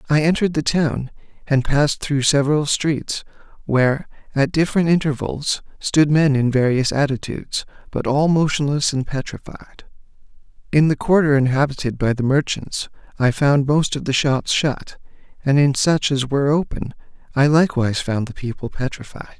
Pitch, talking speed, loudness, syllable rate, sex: 140 Hz, 150 wpm, -19 LUFS, 5.1 syllables/s, male